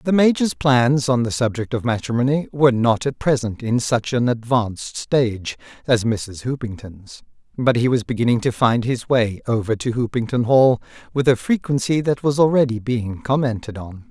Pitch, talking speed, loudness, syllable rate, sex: 125 Hz, 175 wpm, -19 LUFS, 5.0 syllables/s, male